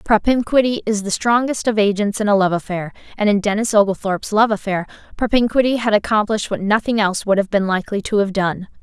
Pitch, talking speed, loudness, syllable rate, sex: 210 Hz, 195 wpm, -18 LUFS, 6.2 syllables/s, female